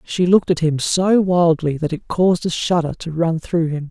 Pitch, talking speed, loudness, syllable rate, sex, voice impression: 170 Hz, 230 wpm, -18 LUFS, 5.1 syllables/s, male, masculine, adult-like, relaxed, slightly weak, soft, slightly muffled, calm, friendly, reassuring, kind, modest